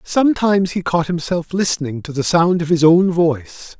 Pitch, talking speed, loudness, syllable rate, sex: 170 Hz, 190 wpm, -16 LUFS, 5.2 syllables/s, male